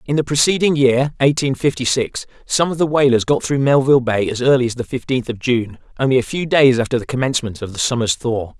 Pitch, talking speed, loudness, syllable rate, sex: 130 Hz, 230 wpm, -17 LUFS, 5.7 syllables/s, male